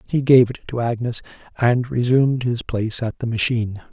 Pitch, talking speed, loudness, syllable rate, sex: 120 Hz, 185 wpm, -20 LUFS, 5.6 syllables/s, male